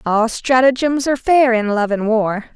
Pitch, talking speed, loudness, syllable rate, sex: 240 Hz, 190 wpm, -16 LUFS, 4.7 syllables/s, female